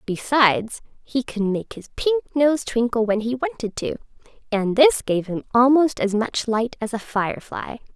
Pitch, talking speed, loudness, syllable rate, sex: 240 Hz, 165 wpm, -21 LUFS, 4.4 syllables/s, female